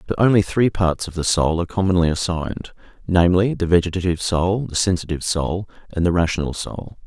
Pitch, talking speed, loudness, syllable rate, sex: 90 Hz, 170 wpm, -20 LUFS, 6.1 syllables/s, male